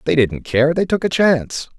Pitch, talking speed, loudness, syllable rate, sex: 145 Hz, 235 wpm, -17 LUFS, 5.1 syllables/s, male